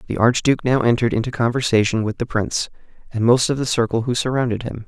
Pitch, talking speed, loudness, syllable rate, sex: 120 Hz, 210 wpm, -19 LUFS, 6.9 syllables/s, male